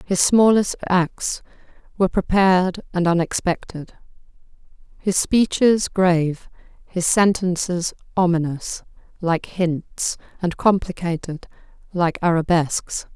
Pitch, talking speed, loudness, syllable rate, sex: 180 Hz, 85 wpm, -20 LUFS, 3.9 syllables/s, female